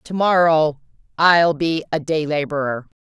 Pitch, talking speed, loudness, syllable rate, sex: 155 Hz, 140 wpm, -18 LUFS, 4.2 syllables/s, female